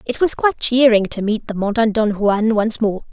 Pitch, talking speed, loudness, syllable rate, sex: 220 Hz, 230 wpm, -17 LUFS, 5.4 syllables/s, female